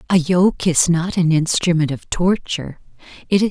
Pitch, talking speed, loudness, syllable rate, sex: 170 Hz, 170 wpm, -17 LUFS, 4.8 syllables/s, female